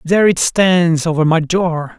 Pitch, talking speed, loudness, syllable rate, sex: 170 Hz, 180 wpm, -14 LUFS, 4.2 syllables/s, male